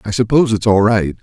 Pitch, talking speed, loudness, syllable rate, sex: 105 Hz, 245 wpm, -14 LUFS, 6.5 syllables/s, male